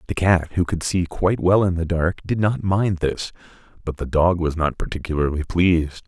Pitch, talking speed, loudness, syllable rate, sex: 85 Hz, 205 wpm, -21 LUFS, 5.3 syllables/s, male